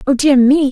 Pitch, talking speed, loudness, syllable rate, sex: 275 Hz, 250 wpm, -11 LUFS, 4.8 syllables/s, female